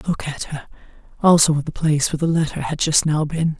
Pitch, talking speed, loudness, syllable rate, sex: 155 Hz, 250 wpm, -19 LUFS, 6.4 syllables/s, female